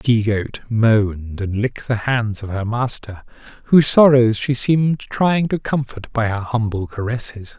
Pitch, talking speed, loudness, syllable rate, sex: 115 Hz, 175 wpm, -18 LUFS, 4.8 syllables/s, male